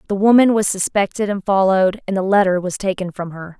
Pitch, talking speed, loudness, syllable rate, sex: 195 Hz, 215 wpm, -17 LUFS, 6.0 syllables/s, female